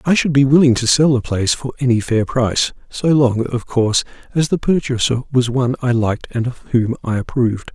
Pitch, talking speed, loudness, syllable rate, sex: 125 Hz, 210 wpm, -17 LUFS, 5.7 syllables/s, male